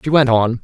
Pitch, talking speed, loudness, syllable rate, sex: 125 Hz, 285 wpm, -14 LUFS, 5.7 syllables/s, male